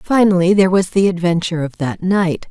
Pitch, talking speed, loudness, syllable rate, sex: 180 Hz, 190 wpm, -15 LUFS, 5.7 syllables/s, female